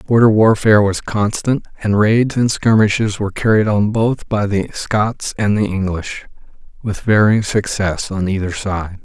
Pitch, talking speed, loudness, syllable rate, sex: 105 Hz, 160 wpm, -16 LUFS, 4.4 syllables/s, male